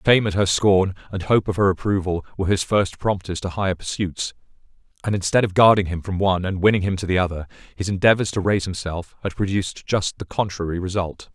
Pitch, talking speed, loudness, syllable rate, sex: 95 Hz, 210 wpm, -21 LUFS, 6.2 syllables/s, male